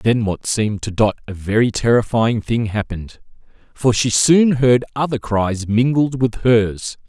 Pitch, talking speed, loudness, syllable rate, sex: 115 Hz, 160 wpm, -17 LUFS, 4.4 syllables/s, male